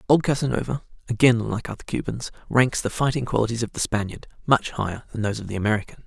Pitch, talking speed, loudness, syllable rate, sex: 115 Hz, 200 wpm, -24 LUFS, 6.7 syllables/s, male